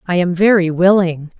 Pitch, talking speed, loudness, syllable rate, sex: 180 Hz, 170 wpm, -14 LUFS, 5.0 syllables/s, female